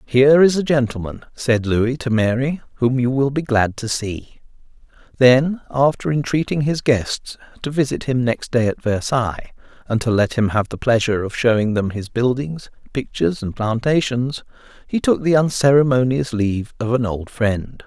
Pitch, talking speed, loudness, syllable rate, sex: 125 Hz, 170 wpm, -19 LUFS, 4.9 syllables/s, male